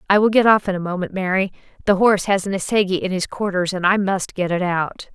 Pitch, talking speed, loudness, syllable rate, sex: 190 Hz, 255 wpm, -19 LUFS, 6.1 syllables/s, female